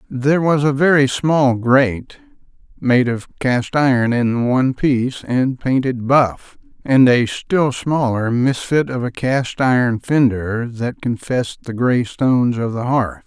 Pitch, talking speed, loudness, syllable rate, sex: 125 Hz, 155 wpm, -17 LUFS, 4.0 syllables/s, male